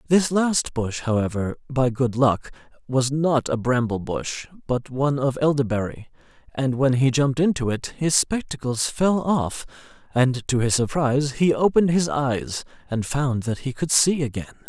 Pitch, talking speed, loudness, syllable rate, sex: 135 Hz, 170 wpm, -22 LUFS, 4.6 syllables/s, male